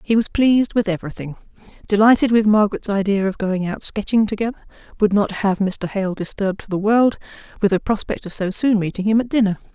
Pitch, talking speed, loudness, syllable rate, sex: 205 Hz, 205 wpm, -19 LUFS, 6.1 syllables/s, female